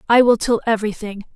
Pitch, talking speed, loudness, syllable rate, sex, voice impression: 220 Hz, 180 wpm, -17 LUFS, 6.5 syllables/s, female, feminine, slightly adult-like, tensed, slightly bright, clear, slightly cute, slightly refreshing, friendly